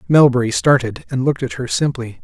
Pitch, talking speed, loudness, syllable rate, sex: 125 Hz, 190 wpm, -17 LUFS, 5.9 syllables/s, male